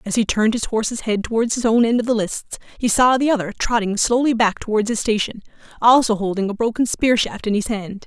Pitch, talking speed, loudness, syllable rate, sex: 225 Hz, 240 wpm, -19 LUFS, 6.0 syllables/s, female